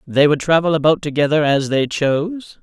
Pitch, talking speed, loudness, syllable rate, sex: 155 Hz, 185 wpm, -16 LUFS, 5.2 syllables/s, male